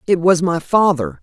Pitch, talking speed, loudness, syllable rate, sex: 180 Hz, 195 wpm, -15 LUFS, 4.6 syllables/s, female